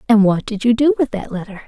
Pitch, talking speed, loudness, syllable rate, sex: 225 Hz, 285 wpm, -17 LUFS, 6.3 syllables/s, female